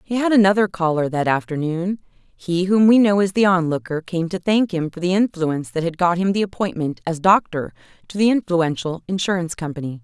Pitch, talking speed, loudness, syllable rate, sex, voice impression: 180 Hz, 195 wpm, -19 LUFS, 5.6 syllables/s, female, feminine, adult-like, tensed, bright, clear, slightly halting, intellectual, friendly, elegant, lively, slightly intense, sharp